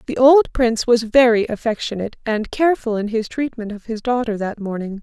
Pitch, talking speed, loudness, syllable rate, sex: 240 Hz, 190 wpm, -18 LUFS, 5.7 syllables/s, female